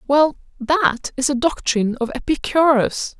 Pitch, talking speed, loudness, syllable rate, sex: 270 Hz, 130 wpm, -19 LUFS, 4.4 syllables/s, female